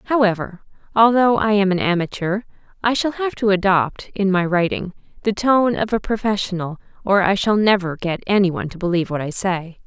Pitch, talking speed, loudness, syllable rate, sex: 195 Hz, 190 wpm, -19 LUFS, 5.4 syllables/s, female